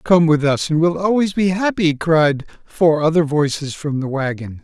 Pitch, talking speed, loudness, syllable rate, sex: 160 Hz, 195 wpm, -17 LUFS, 4.6 syllables/s, male